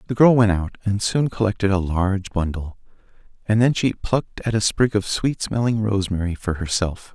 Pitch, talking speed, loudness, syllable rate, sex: 105 Hz, 195 wpm, -21 LUFS, 5.3 syllables/s, male